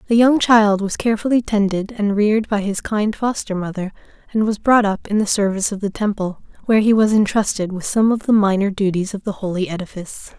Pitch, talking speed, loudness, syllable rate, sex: 205 Hz, 215 wpm, -18 LUFS, 5.9 syllables/s, female